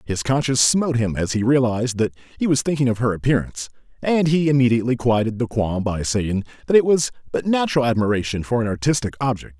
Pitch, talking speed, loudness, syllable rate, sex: 125 Hz, 200 wpm, -20 LUFS, 6.4 syllables/s, male